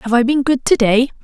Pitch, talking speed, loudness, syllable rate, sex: 250 Hz, 245 wpm, -14 LUFS, 5.5 syllables/s, female